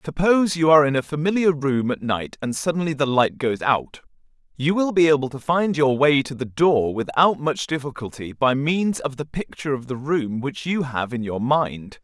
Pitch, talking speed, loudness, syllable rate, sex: 145 Hz, 215 wpm, -21 LUFS, 5.0 syllables/s, male